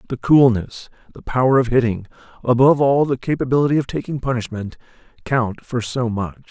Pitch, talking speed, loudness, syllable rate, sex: 125 Hz, 155 wpm, -18 LUFS, 5.6 syllables/s, male